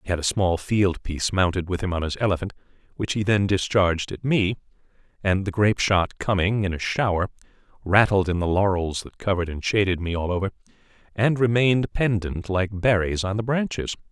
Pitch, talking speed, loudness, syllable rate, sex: 100 Hz, 190 wpm, -23 LUFS, 5.7 syllables/s, male